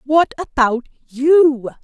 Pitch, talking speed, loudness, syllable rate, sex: 280 Hz, 100 wpm, -16 LUFS, 2.8 syllables/s, female